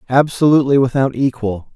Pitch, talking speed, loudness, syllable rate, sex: 130 Hz, 100 wpm, -15 LUFS, 5.7 syllables/s, male